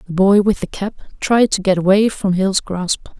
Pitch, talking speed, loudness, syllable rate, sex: 195 Hz, 225 wpm, -16 LUFS, 5.1 syllables/s, female